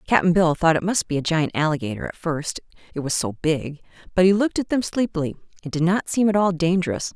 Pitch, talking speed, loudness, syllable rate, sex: 170 Hz, 235 wpm, -22 LUFS, 6.0 syllables/s, female